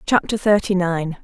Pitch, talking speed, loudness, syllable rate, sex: 190 Hz, 145 wpm, -19 LUFS, 4.6 syllables/s, female